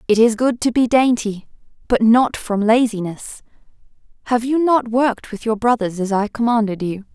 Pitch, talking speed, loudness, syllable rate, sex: 225 Hz, 175 wpm, -18 LUFS, 5.0 syllables/s, female